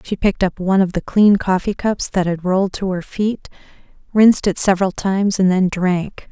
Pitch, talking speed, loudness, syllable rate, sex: 190 Hz, 210 wpm, -17 LUFS, 5.4 syllables/s, female